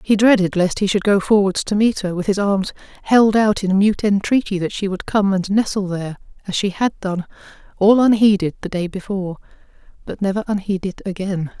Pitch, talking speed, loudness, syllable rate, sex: 200 Hz, 195 wpm, -18 LUFS, 5.4 syllables/s, female